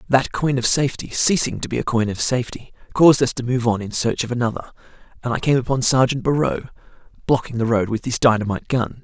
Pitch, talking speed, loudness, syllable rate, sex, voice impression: 125 Hz, 220 wpm, -19 LUFS, 6.5 syllables/s, male, very masculine, very adult-like, middle-aged, very thick, tensed, slightly powerful, slightly bright, very hard, very muffled, slightly fluent, very raspy, cool, very intellectual, sincere, slightly calm, very mature, friendly, reassuring, very unique, very wild, slightly sweet, lively, intense